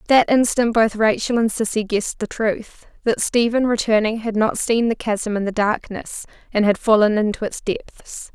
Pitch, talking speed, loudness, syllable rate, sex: 220 Hz, 180 wpm, -19 LUFS, 4.7 syllables/s, female